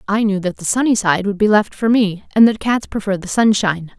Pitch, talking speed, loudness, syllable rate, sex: 205 Hz, 255 wpm, -16 LUFS, 5.7 syllables/s, female